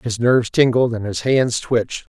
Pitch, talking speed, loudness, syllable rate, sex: 120 Hz, 195 wpm, -18 LUFS, 4.9 syllables/s, male